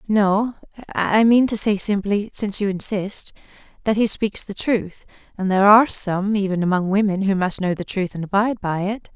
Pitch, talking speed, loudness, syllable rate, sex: 200 Hz, 170 wpm, -20 LUFS, 5.1 syllables/s, female